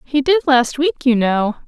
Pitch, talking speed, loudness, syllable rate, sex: 265 Hz, 215 wpm, -16 LUFS, 4.1 syllables/s, female